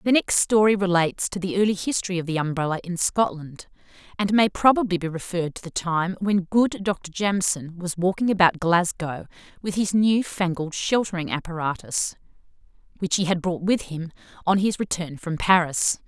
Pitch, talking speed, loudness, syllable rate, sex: 180 Hz, 170 wpm, -23 LUFS, 5.2 syllables/s, female